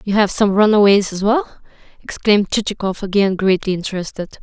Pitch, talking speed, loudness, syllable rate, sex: 200 Hz, 150 wpm, -16 LUFS, 5.8 syllables/s, female